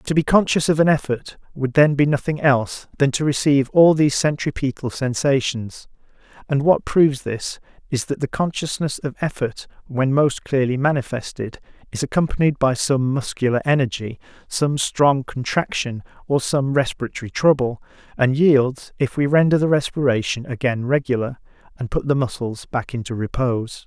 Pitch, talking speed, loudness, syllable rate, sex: 135 Hz, 155 wpm, -20 LUFS, 5.1 syllables/s, male